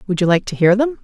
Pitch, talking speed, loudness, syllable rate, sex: 205 Hz, 345 wpm, -16 LUFS, 7.0 syllables/s, female